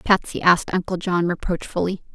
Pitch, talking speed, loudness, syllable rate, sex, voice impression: 180 Hz, 140 wpm, -21 LUFS, 5.6 syllables/s, female, feminine, adult-like, tensed, powerful, slightly dark, clear, fluent, intellectual, calm, reassuring, elegant, lively, kind